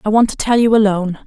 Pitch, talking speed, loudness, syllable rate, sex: 210 Hz, 285 wpm, -14 LUFS, 7.1 syllables/s, female